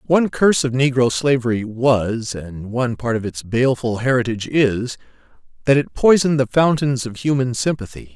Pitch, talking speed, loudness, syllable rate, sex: 125 Hz, 160 wpm, -18 LUFS, 5.3 syllables/s, male